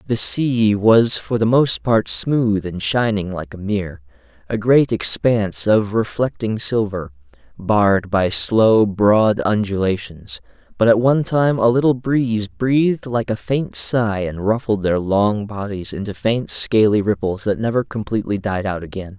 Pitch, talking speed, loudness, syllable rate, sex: 105 Hz, 160 wpm, -18 LUFS, 4.3 syllables/s, male